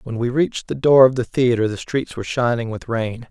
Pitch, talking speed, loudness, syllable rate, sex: 120 Hz, 255 wpm, -19 LUFS, 5.6 syllables/s, male